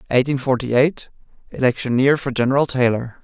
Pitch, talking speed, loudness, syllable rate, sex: 130 Hz, 110 wpm, -18 LUFS, 8.2 syllables/s, male